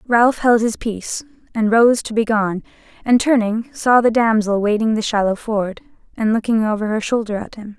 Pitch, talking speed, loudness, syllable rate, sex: 220 Hz, 195 wpm, -17 LUFS, 5.0 syllables/s, female